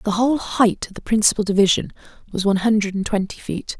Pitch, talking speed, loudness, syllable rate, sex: 205 Hz, 205 wpm, -19 LUFS, 6.5 syllables/s, female